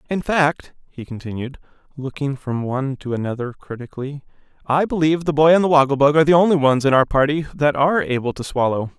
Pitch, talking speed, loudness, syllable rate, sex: 140 Hz, 200 wpm, -18 LUFS, 6.2 syllables/s, male